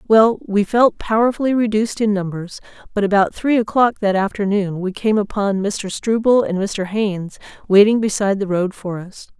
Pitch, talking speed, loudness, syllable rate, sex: 205 Hz, 170 wpm, -18 LUFS, 5.1 syllables/s, female